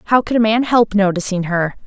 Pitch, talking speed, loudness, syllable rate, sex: 210 Hz, 225 wpm, -16 LUFS, 5.1 syllables/s, female